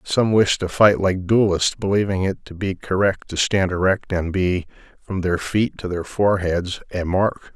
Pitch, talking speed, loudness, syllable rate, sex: 95 Hz, 190 wpm, -20 LUFS, 4.6 syllables/s, male